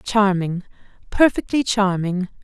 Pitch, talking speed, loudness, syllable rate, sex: 200 Hz, 75 wpm, -19 LUFS, 3.9 syllables/s, female